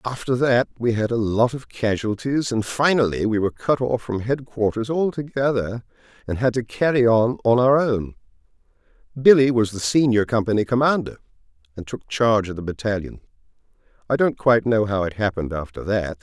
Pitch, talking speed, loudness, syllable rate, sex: 115 Hz, 170 wpm, -21 LUFS, 5.5 syllables/s, male